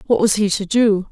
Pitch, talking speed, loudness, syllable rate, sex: 205 Hz, 270 wpm, -17 LUFS, 5.4 syllables/s, female